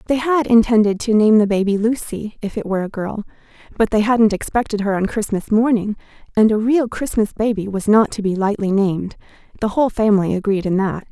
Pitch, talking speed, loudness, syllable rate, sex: 215 Hz, 200 wpm, -18 LUFS, 5.8 syllables/s, female